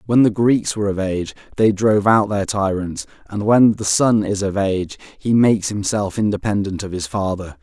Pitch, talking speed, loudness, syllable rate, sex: 100 Hz, 195 wpm, -18 LUFS, 5.2 syllables/s, male